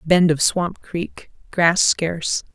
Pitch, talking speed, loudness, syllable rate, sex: 170 Hz, 120 wpm, -19 LUFS, 3.2 syllables/s, female